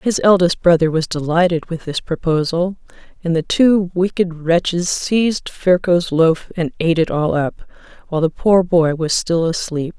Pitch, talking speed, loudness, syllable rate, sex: 170 Hz, 170 wpm, -17 LUFS, 4.6 syllables/s, female